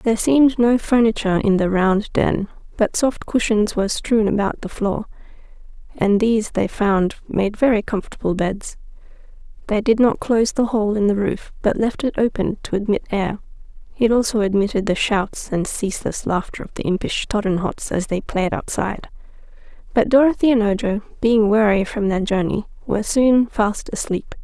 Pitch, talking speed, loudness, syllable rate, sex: 210 Hz, 170 wpm, -19 LUFS, 5.1 syllables/s, female